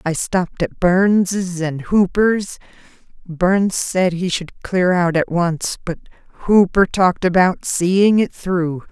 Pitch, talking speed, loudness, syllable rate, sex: 180 Hz, 140 wpm, -17 LUFS, 3.4 syllables/s, female